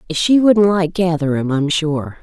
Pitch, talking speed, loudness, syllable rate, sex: 170 Hz, 160 wpm, -15 LUFS, 4.0 syllables/s, female